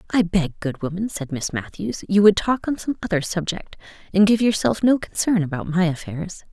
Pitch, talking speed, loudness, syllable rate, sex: 185 Hz, 200 wpm, -21 LUFS, 5.2 syllables/s, female